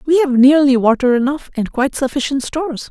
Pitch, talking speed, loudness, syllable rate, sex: 270 Hz, 185 wpm, -15 LUFS, 5.8 syllables/s, female